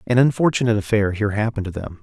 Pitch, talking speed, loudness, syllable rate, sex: 110 Hz, 210 wpm, -20 LUFS, 7.9 syllables/s, male